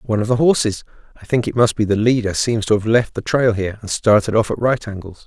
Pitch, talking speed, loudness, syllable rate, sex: 110 Hz, 275 wpm, -17 LUFS, 6.2 syllables/s, male